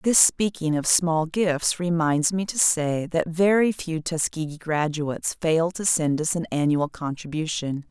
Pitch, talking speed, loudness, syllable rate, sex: 160 Hz, 160 wpm, -23 LUFS, 4.1 syllables/s, female